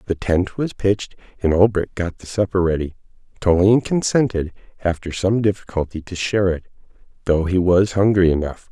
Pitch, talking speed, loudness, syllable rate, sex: 95 Hz, 160 wpm, -19 LUFS, 5.7 syllables/s, male